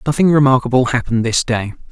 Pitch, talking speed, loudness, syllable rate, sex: 130 Hz, 155 wpm, -15 LUFS, 6.7 syllables/s, male